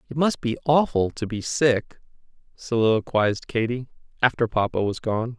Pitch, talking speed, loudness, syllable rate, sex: 120 Hz, 145 wpm, -23 LUFS, 4.9 syllables/s, male